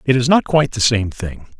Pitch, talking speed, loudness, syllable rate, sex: 125 Hz, 265 wpm, -16 LUFS, 5.7 syllables/s, male